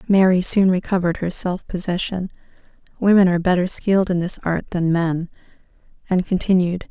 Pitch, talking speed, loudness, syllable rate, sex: 180 Hz, 130 wpm, -19 LUFS, 5.6 syllables/s, female